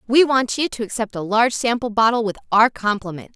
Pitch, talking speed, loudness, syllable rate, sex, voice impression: 225 Hz, 215 wpm, -19 LUFS, 5.9 syllables/s, female, feminine, adult-like, tensed, powerful, hard, clear, fluent, intellectual, friendly, slightly wild, lively, intense, sharp